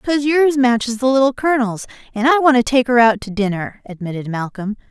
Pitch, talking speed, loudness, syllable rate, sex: 240 Hz, 210 wpm, -16 LUFS, 6.0 syllables/s, female